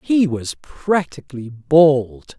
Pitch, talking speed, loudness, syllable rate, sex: 140 Hz, 100 wpm, -17 LUFS, 3.1 syllables/s, male